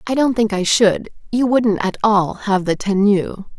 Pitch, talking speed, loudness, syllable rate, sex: 210 Hz, 200 wpm, -17 LUFS, 4.2 syllables/s, female